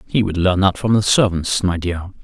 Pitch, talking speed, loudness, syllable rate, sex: 95 Hz, 240 wpm, -17 LUFS, 5.1 syllables/s, male